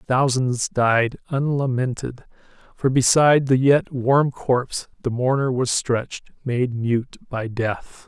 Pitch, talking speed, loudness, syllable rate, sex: 130 Hz, 125 wpm, -21 LUFS, 3.7 syllables/s, male